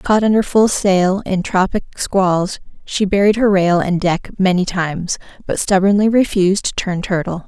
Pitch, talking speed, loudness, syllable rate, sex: 190 Hz, 170 wpm, -16 LUFS, 4.5 syllables/s, female